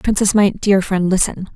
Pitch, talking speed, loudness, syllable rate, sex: 195 Hz, 195 wpm, -16 LUFS, 4.7 syllables/s, female